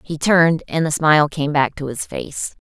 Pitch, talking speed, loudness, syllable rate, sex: 155 Hz, 230 wpm, -18 LUFS, 4.9 syllables/s, female